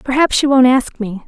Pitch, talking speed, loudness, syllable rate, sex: 255 Hz, 235 wpm, -13 LUFS, 5.1 syllables/s, female